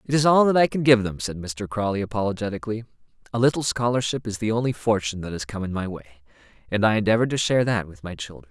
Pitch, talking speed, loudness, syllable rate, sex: 110 Hz, 240 wpm, -23 LUFS, 7.0 syllables/s, male